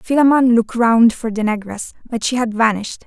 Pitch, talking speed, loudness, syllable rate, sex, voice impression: 230 Hz, 195 wpm, -16 LUFS, 5.5 syllables/s, female, feminine, slightly young, slightly soft, slightly calm, friendly, slightly reassuring, slightly kind